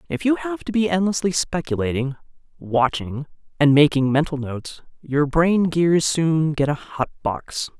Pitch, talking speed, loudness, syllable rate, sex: 155 Hz, 155 wpm, -21 LUFS, 4.5 syllables/s, female